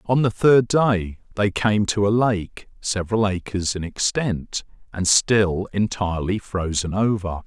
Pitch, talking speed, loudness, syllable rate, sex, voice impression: 100 Hz, 145 wpm, -21 LUFS, 4.0 syllables/s, male, very masculine, very adult-like, very middle-aged, very thick, very tensed, very powerful, slightly bright, soft, slightly muffled, fluent, very cool, very intellectual, very sincere, very calm, very mature, very friendly, very reassuring, unique, elegant, wild, very sweet, slightly lively, slightly kind, modest